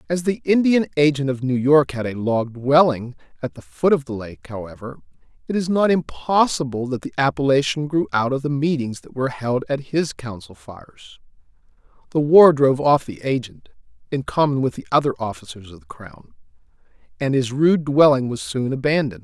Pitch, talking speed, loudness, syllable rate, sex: 135 Hz, 185 wpm, -19 LUFS, 5.3 syllables/s, male